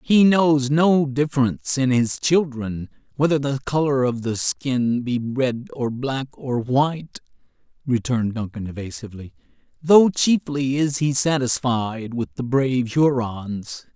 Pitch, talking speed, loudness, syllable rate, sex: 130 Hz, 135 wpm, -21 LUFS, 4.1 syllables/s, male